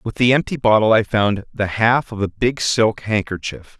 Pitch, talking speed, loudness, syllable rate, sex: 110 Hz, 205 wpm, -18 LUFS, 4.7 syllables/s, male